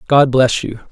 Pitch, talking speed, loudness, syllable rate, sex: 130 Hz, 195 wpm, -14 LUFS, 4.5 syllables/s, male